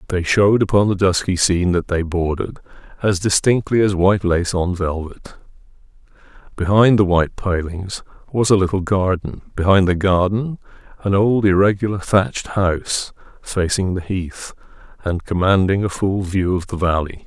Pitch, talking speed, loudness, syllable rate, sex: 95 Hz, 150 wpm, -18 LUFS, 5.0 syllables/s, male